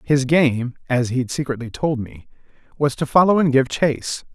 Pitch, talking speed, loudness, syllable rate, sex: 135 Hz, 150 wpm, -19 LUFS, 4.8 syllables/s, male